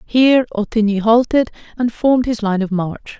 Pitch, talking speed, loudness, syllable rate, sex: 225 Hz, 170 wpm, -16 LUFS, 5.1 syllables/s, female